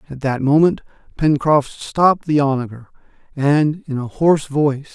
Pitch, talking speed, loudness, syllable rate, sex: 145 Hz, 145 wpm, -17 LUFS, 4.9 syllables/s, male